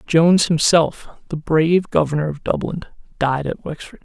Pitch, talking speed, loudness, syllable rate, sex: 160 Hz, 150 wpm, -18 LUFS, 4.9 syllables/s, male